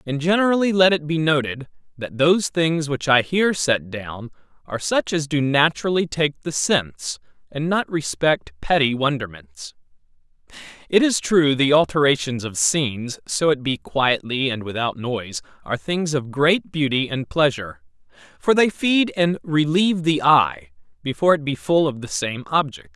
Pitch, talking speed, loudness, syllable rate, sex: 145 Hz, 165 wpm, -20 LUFS, 4.8 syllables/s, male